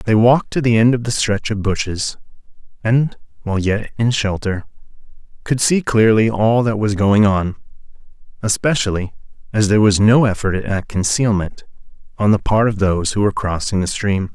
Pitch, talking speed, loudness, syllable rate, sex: 110 Hz, 170 wpm, -17 LUFS, 5.2 syllables/s, male